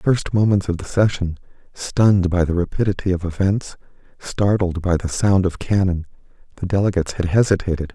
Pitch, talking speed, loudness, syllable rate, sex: 95 Hz, 175 wpm, -19 LUFS, 5.7 syllables/s, male